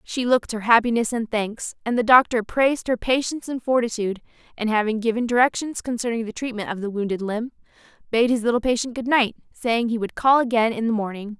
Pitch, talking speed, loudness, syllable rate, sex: 230 Hz, 205 wpm, -22 LUFS, 6.0 syllables/s, female